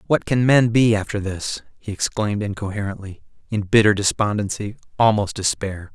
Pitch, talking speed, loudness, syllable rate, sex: 105 Hz, 140 wpm, -20 LUFS, 5.3 syllables/s, male